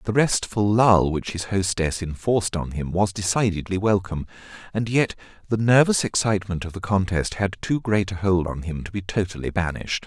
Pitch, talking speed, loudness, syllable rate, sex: 100 Hz, 185 wpm, -23 LUFS, 5.4 syllables/s, male